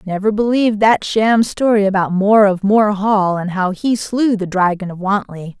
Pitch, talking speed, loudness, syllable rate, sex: 205 Hz, 195 wpm, -15 LUFS, 4.6 syllables/s, female